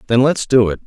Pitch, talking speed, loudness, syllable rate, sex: 125 Hz, 280 wpm, -15 LUFS, 6.2 syllables/s, male